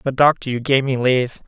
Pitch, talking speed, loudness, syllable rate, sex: 130 Hz, 245 wpm, -18 LUFS, 6.0 syllables/s, male